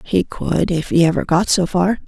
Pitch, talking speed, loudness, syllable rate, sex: 185 Hz, 200 wpm, -17 LUFS, 4.7 syllables/s, female